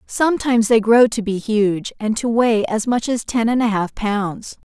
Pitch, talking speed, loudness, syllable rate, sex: 225 Hz, 215 wpm, -18 LUFS, 4.5 syllables/s, female